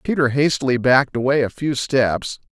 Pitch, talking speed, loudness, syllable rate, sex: 130 Hz, 165 wpm, -18 LUFS, 5.2 syllables/s, male